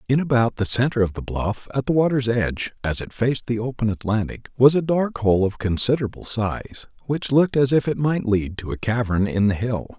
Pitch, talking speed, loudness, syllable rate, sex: 120 Hz, 220 wpm, -21 LUFS, 5.6 syllables/s, male